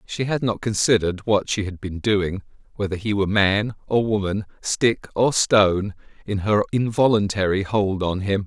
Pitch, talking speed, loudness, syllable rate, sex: 100 Hz, 170 wpm, -21 LUFS, 4.8 syllables/s, male